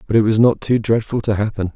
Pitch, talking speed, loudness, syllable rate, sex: 110 Hz, 275 wpm, -17 LUFS, 6.3 syllables/s, male